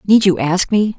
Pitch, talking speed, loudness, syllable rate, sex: 195 Hz, 245 wpm, -15 LUFS, 4.7 syllables/s, female